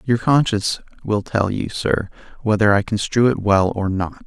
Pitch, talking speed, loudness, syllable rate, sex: 105 Hz, 185 wpm, -19 LUFS, 4.7 syllables/s, male